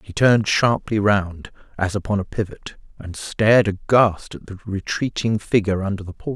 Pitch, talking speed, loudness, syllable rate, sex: 105 Hz, 170 wpm, -20 LUFS, 5.0 syllables/s, male